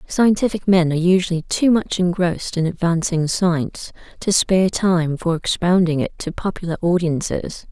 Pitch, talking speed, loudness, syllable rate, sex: 175 Hz, 150 wpm, -19 LUFS, 5.0 syllables/s, female